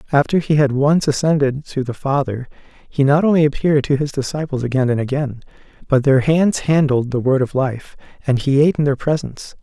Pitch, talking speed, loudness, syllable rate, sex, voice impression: 140 Hz, 200 wpm, -17 LUFS, 5.8 syllables/s, male, masculine, adult-like, soft, slightly sincere, calm, friendly, reassuring, kind